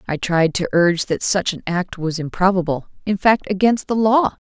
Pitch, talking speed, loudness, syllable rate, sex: 185 Hz, 200 wpm, -18 LUFS, 5.1 syllables/s, female